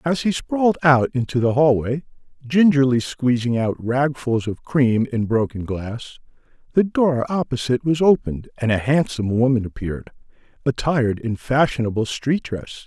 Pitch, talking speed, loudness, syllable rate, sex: 130 Hz, 145 wpm, -20 LUFS, 4.9 syllables/s, male